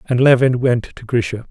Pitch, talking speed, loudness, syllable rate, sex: 120 Hz, 200 wpm, -16 LUFS, 5.1 syllables/s, male